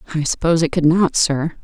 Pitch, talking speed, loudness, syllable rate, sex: 165 Hz, 220 wpm, -17 LUFS, 6.3 syllables/s, female